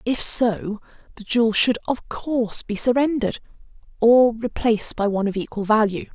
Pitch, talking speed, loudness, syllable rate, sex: 230 Hz, 145 wpm, -20 LUFS, 5.2 syllables/s, female